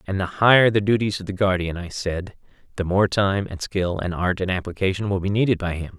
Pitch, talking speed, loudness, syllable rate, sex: 95 Hz, 240 wpm, -22 LUFS, 5.7 syllables/s, male